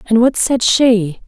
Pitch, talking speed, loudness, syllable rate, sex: 230 Hz, 190 wpm, -13 LUFS, 3.5 syllables/s, female